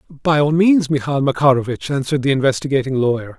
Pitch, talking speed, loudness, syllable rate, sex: 140 Hz, 160 wpm, -17 LUFS, 6.2 syllables/s, male